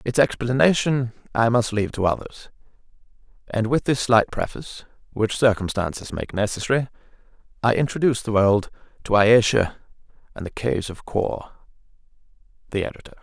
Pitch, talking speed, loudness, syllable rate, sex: 110 Hz, 125 wpm, -22 LUFS, 5.6 syllables/s, male